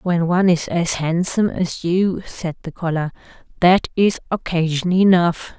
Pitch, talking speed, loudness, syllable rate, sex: 175 Hz, 150 wpm, -19 LUFS, 4.5 syllables/s, female